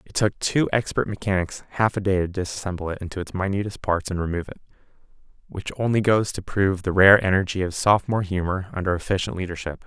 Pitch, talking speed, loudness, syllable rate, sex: 95 Hz, 195 wpm, -23 LUFS, 6.4 syllables/s, male